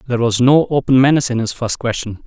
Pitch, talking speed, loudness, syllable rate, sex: 125 Hz, 240 wpm, -15 LUFS, 6.7 syllables/s, male